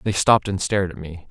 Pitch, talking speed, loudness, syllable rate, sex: 95 Hz, 275 wpm, -20 LUFS, 6.7 syllables/s, male